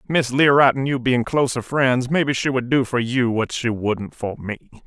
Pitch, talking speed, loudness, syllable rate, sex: 125 Hz, 220 wpm, -20 LUFS, 4.8 syllables/s, male